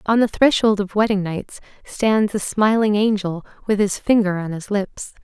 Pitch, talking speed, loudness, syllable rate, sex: 205 Hz, 185 wpm, -19 LUFS, 4.6 syllables/s, female